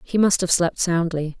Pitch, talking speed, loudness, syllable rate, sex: 170 Hz, 215 wpm, -20 LUFS, 4.7 syllables/s, female